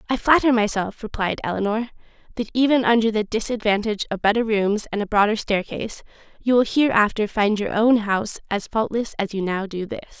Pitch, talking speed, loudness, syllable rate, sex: 220 Hz, 180 wpm, -21 LUFS, 5.8 syllables/s, female